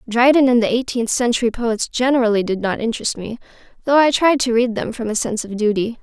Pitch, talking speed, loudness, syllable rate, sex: 235 Hz, 220 wpm, -18 LUFS, 6.1 syllables/s, female